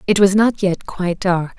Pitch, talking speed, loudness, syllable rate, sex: 190 Hz, 225 wpm, -17 LUFS, 4.9 syllables/s, female